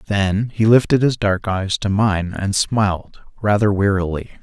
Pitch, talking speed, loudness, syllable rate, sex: 100 Hz, 165 wpm, -18 LUFS, 4.4 syllables/s, male